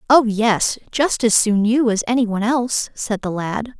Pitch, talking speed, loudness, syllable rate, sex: 225 Hz, 205 wpm, -18 LUFS, 4.8 syllables/s, female